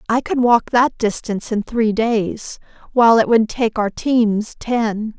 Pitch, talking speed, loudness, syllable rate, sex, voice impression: 225 Hz, 175 wpm, -17 LUFS, 3.9 syllables/s, female, very feminine, slightly young, soft, cute, slightly refreshing, friendly, kind